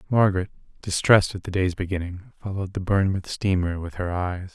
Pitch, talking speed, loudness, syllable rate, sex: 95 Hz, 170 wpm, -24 LUFS, 6.3 syllables/s, male